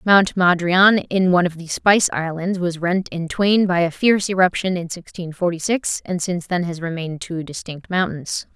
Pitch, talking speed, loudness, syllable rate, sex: 180 Hz, 195 wpm, -19 LUFS, 5.0 syllables/s, female